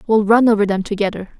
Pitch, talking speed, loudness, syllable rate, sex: 210 Hz, 215 wpm, -16 LUFS, 6.4 syllables/s, female